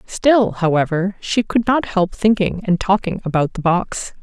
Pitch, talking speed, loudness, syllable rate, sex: 195 Hz, 170 wpm, -18 LUFS, 4.3 syllables/s, female